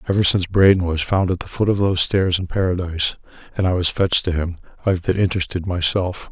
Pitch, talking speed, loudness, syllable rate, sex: 90 Hz, 210 wpm, -19 LUFS, 6.4 syllables/s, male